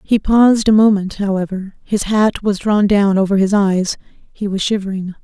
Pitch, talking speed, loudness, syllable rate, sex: 200 Hz, 185 wpm, -15 LUFS, 4.8 syllables/s, female